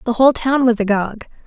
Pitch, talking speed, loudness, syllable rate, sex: 235 Hz, 205 wpm, -16 LUFS, 6.0 syllables/s, female